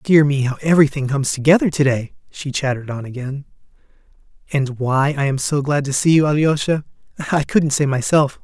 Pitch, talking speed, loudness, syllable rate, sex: 140 Hz, 185 wpm, -18 LUFS, 5.8 syllables/s, male